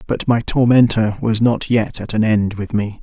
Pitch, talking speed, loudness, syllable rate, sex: 110 Hz, 220 wpm, -17 LUFS, 4.6 syllables/s, male